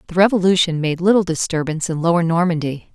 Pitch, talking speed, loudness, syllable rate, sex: 170 Hz, 165 wpm, -17 LUFS, 6.6 syllables/s, female